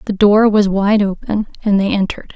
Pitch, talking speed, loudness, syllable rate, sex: 205 Hz, 205 wpm, -15 LUFS, 5.4 syllables/s, female